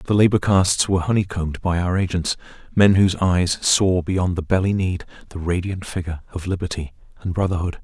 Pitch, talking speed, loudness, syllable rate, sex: 90 Hz, 170 wpm, -20 LUFS, 5.8 syllables/s, male